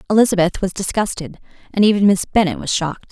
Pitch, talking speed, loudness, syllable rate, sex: 195 Hz, 175 wpm, -17 LUFS, 6.6 syllables/s, female